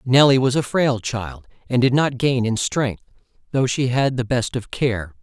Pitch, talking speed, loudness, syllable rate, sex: 125 Hz, 220 wpm, -20 LUFS, 4.4 syllables/s, male